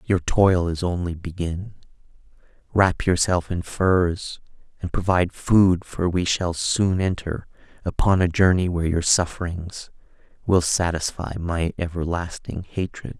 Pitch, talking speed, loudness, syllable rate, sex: 90 Hz, 125 wpm, -22 LUFS, 4.1 syllables/s, male